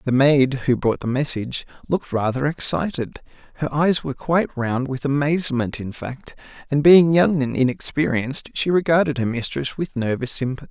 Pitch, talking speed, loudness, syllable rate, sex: 135 Hz, 170 wpm, -21 LUFS, 5.3 syllables/s, male